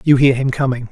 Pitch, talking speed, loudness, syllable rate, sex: 130 Hz, 265 wpm, -15 LUFS, 6.2 syllables/s, male